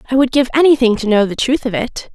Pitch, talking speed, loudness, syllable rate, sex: 245 Hz, 280 wpm, -14 LUFS, 6.4 syllables/s, female